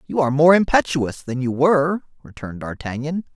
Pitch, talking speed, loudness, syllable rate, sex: 145 Hz, 160 wpm, -19 LUFS, 5.8 syllables/s, male